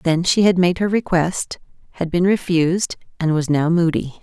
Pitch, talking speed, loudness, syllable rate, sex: 175 Hz, 185 wpm, -18 LUFS, 4.9 syllables/s, female